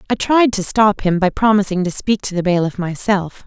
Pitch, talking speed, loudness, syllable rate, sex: 195 Hz, 225 wpm, -16 LUFS, 5.2 syllables/s, female